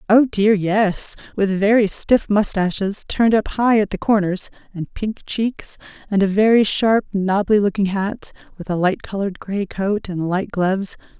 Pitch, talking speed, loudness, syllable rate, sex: 200 Hz, 170 wpm, -19 LUFS, 4.4 syllables/s, female